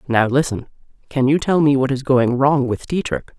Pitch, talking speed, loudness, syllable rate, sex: 135 Hz, 210 wpm, -18 LUFS, 5.0 syllables/s, female